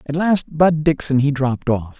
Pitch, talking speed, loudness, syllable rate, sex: 145 Hz, 210 wpm, -18 LUFS, 4.9 syllables/s, male